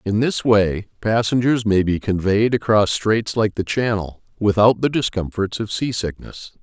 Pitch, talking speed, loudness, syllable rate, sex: 105 Hz, 165 wpm, -19 LUFS, 4.4 syllables/s, male